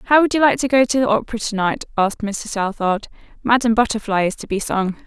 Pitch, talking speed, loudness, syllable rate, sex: 225 Hz, 235 wpm, -19 LUFS, 6.5 syllables/s, female